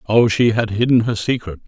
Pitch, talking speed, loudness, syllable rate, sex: 110 Hz, 215 wpm, -17 LUFS, 5.5 syllables/s, male